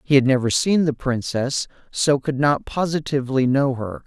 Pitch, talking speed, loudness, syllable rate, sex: 135 Hz, 175 wpm, -21 LUFS, 4.8 syllables/s, male